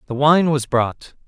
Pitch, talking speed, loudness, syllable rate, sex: 140 Hz, 190 wpm, -17 LUFS, 4.0 syllables/s, male